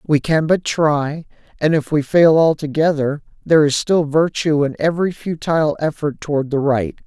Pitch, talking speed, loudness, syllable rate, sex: 155 Hz, 170 wpm, -17 LUFS, 4.8 syllables/s, male